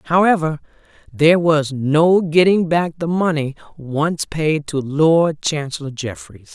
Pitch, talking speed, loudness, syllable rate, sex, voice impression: 155 Hz, 130 wpm, -17 LUFS, 3.8 syllables/s, female, feminine, gender-neutral, slightly thick, tensed, powerful, slightly bright, slightly soft, clear, fluent, slightly cool, intellectual, slightly refreshing, sincere, calm, slightly friendly, slightly reassuring, very unique, elegant, wild, slightly sweet, lively, strict, slightly intense